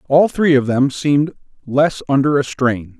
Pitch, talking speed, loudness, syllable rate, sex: 140 Hz, 180 wpm, -16 LUFS, 4.5 syllables/s, male